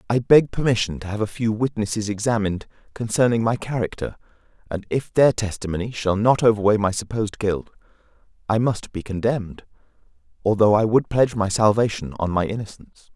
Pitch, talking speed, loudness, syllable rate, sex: 110 Hz, 160 wpm, -21 LUFS, 5.9 syllables/s, male